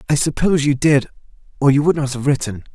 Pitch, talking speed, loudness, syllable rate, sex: 140 Hz, 220 wpm, -17 LUFS, 6.4 syllables/s, male